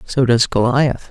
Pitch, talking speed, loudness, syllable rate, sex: 125 Hz, 160 wpm, -15 LUFS, 4.1 syllables/s, female